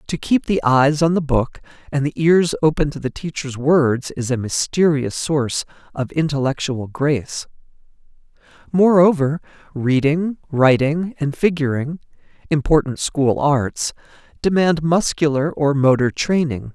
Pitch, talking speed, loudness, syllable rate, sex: 145 Hz, 120 wpm, -18 LUFS, 4.4 syllables/s, male